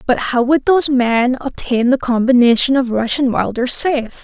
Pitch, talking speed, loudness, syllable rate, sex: 255 Hz, 185 wpm, -15 LUFS, 4.9 syllables/s, female